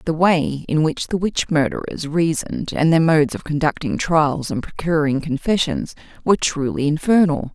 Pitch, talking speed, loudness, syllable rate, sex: 160 Hz, 160 wpm, -19 LUFS, 4.9 syllables/s, female